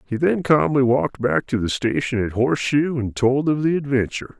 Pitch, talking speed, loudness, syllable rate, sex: 130 Hz, 205 wpm, -20 LUFS, 5.4 syllables/s, male